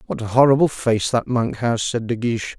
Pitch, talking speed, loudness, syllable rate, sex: 120 Hz, 230 wpm, -19 LUFS, 5.4 syllables/s, male